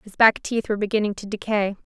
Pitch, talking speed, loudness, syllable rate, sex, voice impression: 210 Hz, 220 wpm, -22 LUFS, 6.5 syllables/s, female, very feminine, young, very thin, tensed, slightly powerful, bright, slightly soft, very clear, very fluent, raspy, very cute, intellectual, very refreshing, sincere, slightly calm, very friendly, reassuring, very unique, elegant, wild, very sweet, very lively, slightly strict, intense, slightly sharp, very light